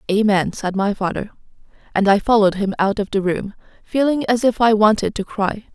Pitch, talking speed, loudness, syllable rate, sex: 210 Hz, 200 wpm, -18 LUFS, 5.5 syllables/s, female